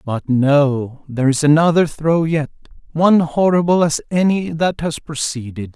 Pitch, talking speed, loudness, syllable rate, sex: 150 Hz, 145 wpm, -16 LUFS, 4.5 syllables/s, male